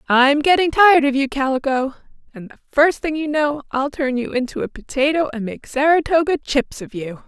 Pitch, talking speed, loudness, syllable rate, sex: 280 Hz, 200 wpm, -18 LUFS, 5.2 syllables/s, female